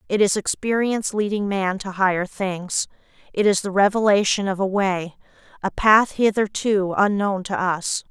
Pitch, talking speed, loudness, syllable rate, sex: 200 Hz, 155 wpm, -21 LUFS, 4.6 syllables/s, female